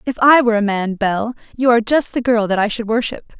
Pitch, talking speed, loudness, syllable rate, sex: 230 Hz, 265 wpm, -16 LUFS, 6.1 syllables/s, female